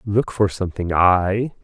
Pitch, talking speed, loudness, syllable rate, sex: 100 Hz, 145 wpm, -19 LUFS, 4.1 syllables/s, male